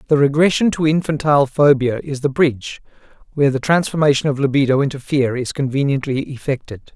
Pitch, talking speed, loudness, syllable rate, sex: 140 Hz, 155 wpm, -17 LUFS, 5.9 syllables/s, male